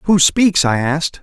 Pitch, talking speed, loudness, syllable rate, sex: 165 Hz, 195 wpm, -14 LUFS, 4.2 syllables/s, male